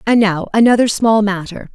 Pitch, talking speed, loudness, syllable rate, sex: 210 Hz, 170 wpm, -14 LUFS, 5.1 syllables/s, female